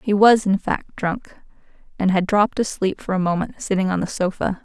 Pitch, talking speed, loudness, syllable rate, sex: 195 Hz, 205 wpm, -20 LUFS, 5.4 syllables/s, female